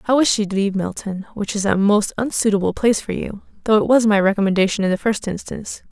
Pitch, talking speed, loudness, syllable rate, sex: 205 Hz, 225 wpm, -19 LUFS, 6.4 syllables/s, female